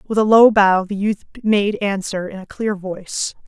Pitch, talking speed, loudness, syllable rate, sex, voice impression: 200 Hz, 205 wpm, -17 LUFS, 4.6 syllables/s, female, feminine, slightly middle-aged, sincere, slightly calm, slightly strict